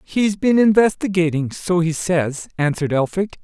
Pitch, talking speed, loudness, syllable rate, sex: 175 Hz, 120 wpm, -18 LUFS, 4.6 syllables/s, male